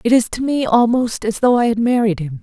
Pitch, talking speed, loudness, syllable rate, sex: 225 Hz, 270 wpm, -16 LUFS, 5.6 syllables/s, female